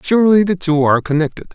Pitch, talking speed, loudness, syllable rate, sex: 175 Hz, 195 wpm, -14 LUFS, 7.1 syllables/s, male